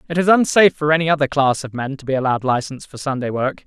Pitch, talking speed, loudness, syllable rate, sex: 145 Hz, 260 wpm, -18 LUFS, 7.2 syllables/s, male